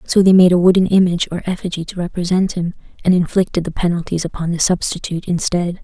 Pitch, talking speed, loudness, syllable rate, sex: 175 Hz, 195 wpm, -16 LUFS, 6.5 syllables/s, female